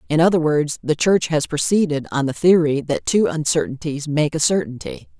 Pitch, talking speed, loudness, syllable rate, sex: 155 Hz, 185 wpm, -19 LUFS, 5.1 syllables/s, female